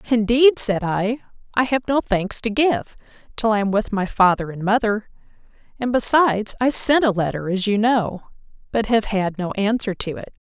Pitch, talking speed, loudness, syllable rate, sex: 220 Hz, 190 wpm, -19 LUFS, 4.9 syllables/s, female